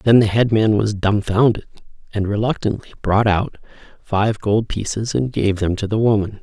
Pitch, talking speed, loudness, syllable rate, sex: 105 Hz, 170 wpm, -19 LUFS, 4.9 syllables/s, male